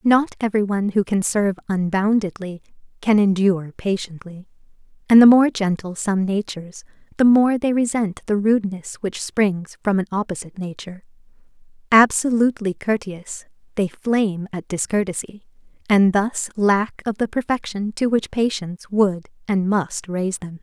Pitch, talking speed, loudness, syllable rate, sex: 205 Hz, 140 wpm, -20 LUFS, 5.0 syllables/s, female